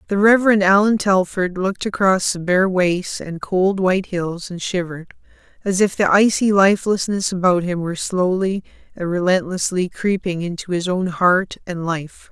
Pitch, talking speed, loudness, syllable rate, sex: 185 Hz, 160 wpm, -18 LUFS, 4.9 syllables/s, female